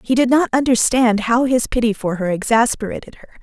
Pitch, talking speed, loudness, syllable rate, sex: 235 Hz, 195 wpm, -17 LUFS, 5.7 syllables/s, female